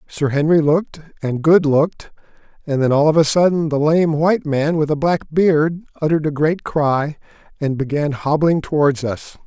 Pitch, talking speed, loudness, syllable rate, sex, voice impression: 155 Hz, 185 wpm, -17 LUFS, 5.0 syllables/s, male, very masculine, very middle-aged, slightly thick, slightly muffled, sincere, slightly calm, slightly mature